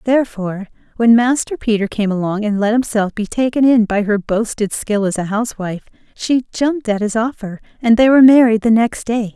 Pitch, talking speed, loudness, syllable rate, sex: 225 Hz, 200 wpm, -15 LUFS, 5.6 syllables/s, female